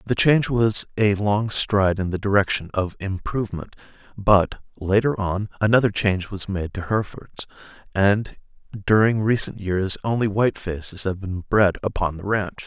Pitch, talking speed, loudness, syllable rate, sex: 100 Hz, 150 wpm, -22 LUFS, 4.9 syllables/s, male